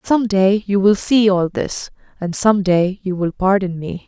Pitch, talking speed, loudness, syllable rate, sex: 195 Hz, 205 wpm, -17 LUFS, 4.2 syllables/s, female